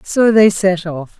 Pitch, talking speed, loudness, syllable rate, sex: 195 Hz, 200 wpm, -13 LUFS, 3.7 syllables/s, female